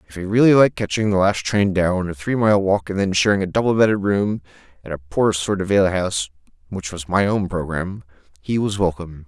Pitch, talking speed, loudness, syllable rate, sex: 95 Hz, 220 wpm, -19 LUFS, 5.5 syllables/s, male